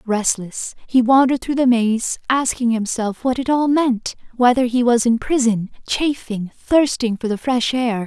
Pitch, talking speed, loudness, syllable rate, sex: 240 Hz, 165 wpm, -18 LUFS, 4.4 syllables/s, female